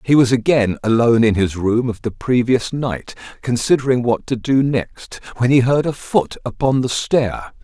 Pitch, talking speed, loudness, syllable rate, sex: 125 Hz, 190 wpm, -17 LUFS, 4.6 syllables/s, male